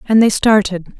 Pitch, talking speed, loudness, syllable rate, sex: 205 Hz, 180 wpm, -13 LUFS, 4.9 syllables/s, female